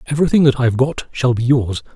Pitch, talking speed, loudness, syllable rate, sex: 130 Hz, 215 wpm, -16 LUFS, 6.4 syllables/s, male